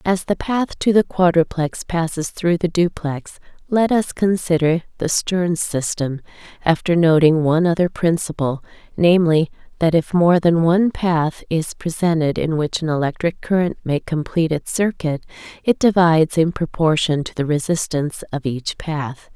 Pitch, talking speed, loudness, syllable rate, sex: 165 Hz, 150 wpm, -19 LUFS, 4.7 syllables/s, female